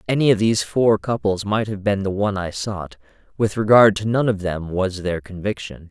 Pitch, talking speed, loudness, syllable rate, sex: 100 Hz, 215 wpm, -20 LUFS, 5.4 syllables/s, male